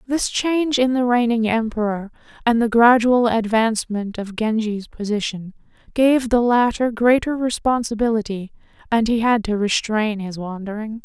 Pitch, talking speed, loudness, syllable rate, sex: 225 Hz, 135 wpm, -19 LUFS, 4.7 syllables/s, female